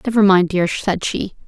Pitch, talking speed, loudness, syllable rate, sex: 190 Hz, 205 wpm, -17 LUFS, 4.8 syllables/s, female